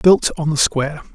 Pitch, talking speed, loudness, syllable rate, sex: 155 Hz, 210 wpm, -17 LUFS, 5.3 syllables/s, male